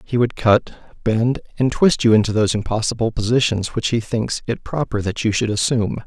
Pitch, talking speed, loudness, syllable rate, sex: 115 Hz, 200 wpm, -19 LUFS, 5.5 syllables/s, male